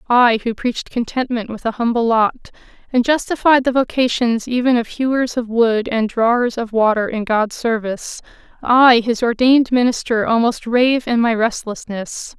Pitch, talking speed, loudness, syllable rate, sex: 235 Hz, 155 wpm, -17 LUFS, 4.9 syllables/s, female